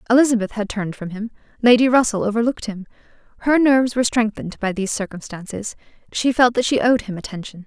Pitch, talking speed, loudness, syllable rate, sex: 225 Hz, 180 wpm, -19 LUFS, 6.8 syllables/s, female